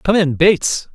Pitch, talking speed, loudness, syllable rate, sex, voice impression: 170 Hz, 190 wpm, -15 LUFS, 4.9 syllables/s, male, masculine, adult-like, slightly bright, refreshing, slightly sincere, slightly lively